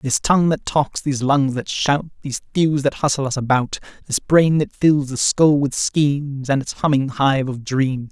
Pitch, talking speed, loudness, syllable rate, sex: 140 Hz, 205 wpm, -19 LUFS, 4.7 syllables/s, male